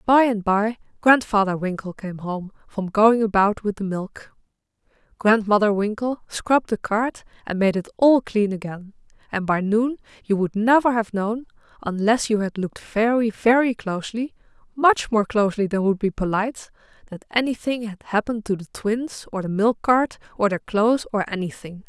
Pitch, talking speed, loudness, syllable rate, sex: 215 Hz, 165 wpm, -22 LUFS, 4.9 syllables/s, female